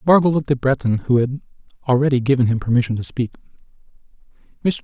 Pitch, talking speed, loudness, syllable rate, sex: 130 Hz, 160 wpm, -19 LUFS, 7.1 syllables/s, male